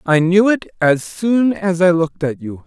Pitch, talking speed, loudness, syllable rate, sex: 175 Hz, 225 wpm, -16 LUFS, 4.6 syllables/s, male